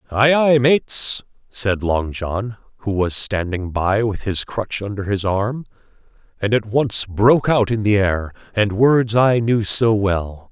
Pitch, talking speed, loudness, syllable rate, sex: 105 Hz, 170 wpm, -18 LUFS, 3.8 syllables/s, male